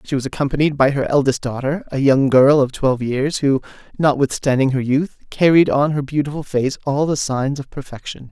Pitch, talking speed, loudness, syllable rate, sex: 140 Hz, 190 wpm, -17 LUFS, 5.4 syllables/s, male